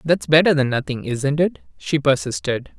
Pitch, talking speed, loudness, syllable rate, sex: 145 Hz, 175 wpm, -19 LUFS, 4.8 syllables/s, male